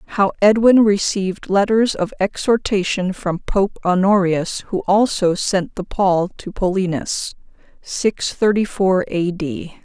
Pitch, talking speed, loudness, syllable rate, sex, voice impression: 195 Hz, 130 wpm, -18 LUFS, 3.5 syllables/s, female, very feminine, slightly middle-aged, slightly thin, slightly tensed, slightly weak, slightly dark, soft, clear, fluent, cool, very intellectual, refreshing, very sincere, calm, very friendly, very reassuring, unique, very elegant, slightly wild, slightly sweet, slightly lively, kind, modest, light